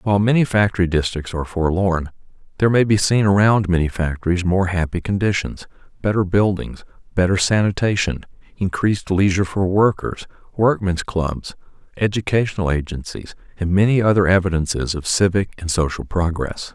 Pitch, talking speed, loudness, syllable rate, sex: 95 Hz, 135 wpm, -19 LUFS, 5.5 syllables/s, male